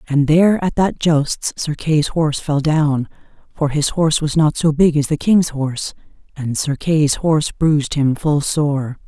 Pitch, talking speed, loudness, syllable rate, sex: 150 Hz, 190 wpm, -17 LUFS, 4.4 syllables/s, female